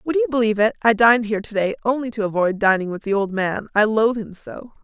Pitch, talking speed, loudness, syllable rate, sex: 220 Hz, 260 wpm, -19 LUFS, 6.7 syllables/s, female